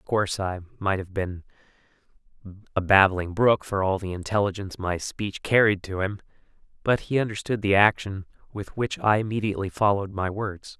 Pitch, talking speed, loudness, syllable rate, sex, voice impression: 100 Hz, 165 wpm, -24 LUFS, 5.3 syllables/s, male, masculine, adult-like, slightly refreshing, sincere